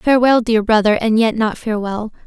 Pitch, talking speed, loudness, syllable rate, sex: 220 Hz, 160 wpm, -16 LUFS, 5.7 syllables/s, female